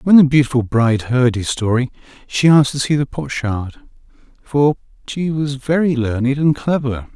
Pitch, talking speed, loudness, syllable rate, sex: 135 Hz, 170 wpm, -17 LUFS, 5.1 syllables/s, male